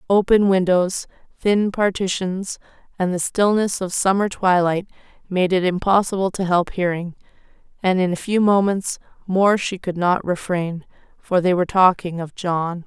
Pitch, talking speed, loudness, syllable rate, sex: 185 Hz, 150 wpm, -20 LUFS, 4.5 syllables/s, female